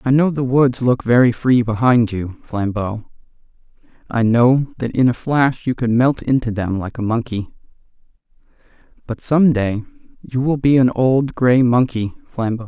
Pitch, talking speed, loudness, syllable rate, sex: 120 Hz, 165 wpm, -17 LUFS, 4.4 syllables/s, male